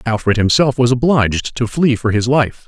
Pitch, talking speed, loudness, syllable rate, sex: 120 Hz, 200 wpm, -15 LUFS, 5.1 syllables/s, male